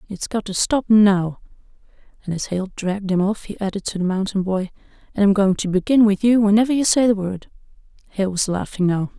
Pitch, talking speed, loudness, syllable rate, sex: 200 Hz, 215 wpm, -19 LUFS, 5.7 syllables/s, female